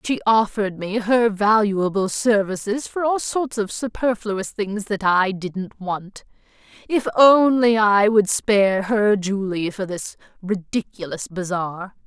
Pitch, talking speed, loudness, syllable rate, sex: 205 Hz, 130 wpm, -20 LUFS, 3.9 syllables/s, female